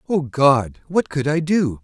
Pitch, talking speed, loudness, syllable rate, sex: 145 Hz, 195 wpm, -19 LUFS, 3.8 syllables/s, male